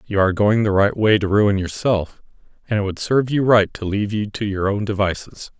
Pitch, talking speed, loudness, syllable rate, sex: 105 Hz, 235 wpm, -19 LUFS, 5.7 syllables/s, male